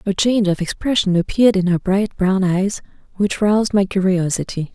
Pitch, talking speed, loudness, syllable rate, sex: 195 Hz, 175 wpm, -18 LUFS, 5.4 syllables/s, female